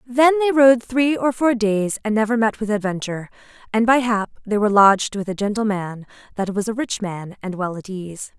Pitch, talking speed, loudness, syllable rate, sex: 215 Hz, 220 wpm, -19 LUFS, 5.4 syllables/s, female